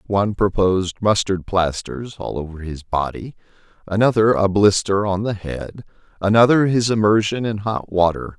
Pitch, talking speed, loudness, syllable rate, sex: 100 Hz, 145 wpm, -19 LUFS, 4.8 syllables/s, male